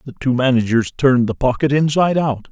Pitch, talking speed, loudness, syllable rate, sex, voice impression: 135 Hz, 190 wpm, -16 LUFS, 6.1 syllables/s, male, very masculine, very adult-like, old, very thick, relaxed, powerful, bright, hard, muffled, slightly fluent, slightly raspy, cool, intellectual, sincere, calm, very mature, very friendly, reassuring, very unique, very wild, slightly lively, strict